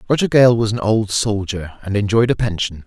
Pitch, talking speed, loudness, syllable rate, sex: 110 Hz, 210 wpm, -17 LUFS, 5.3 syllables/s, male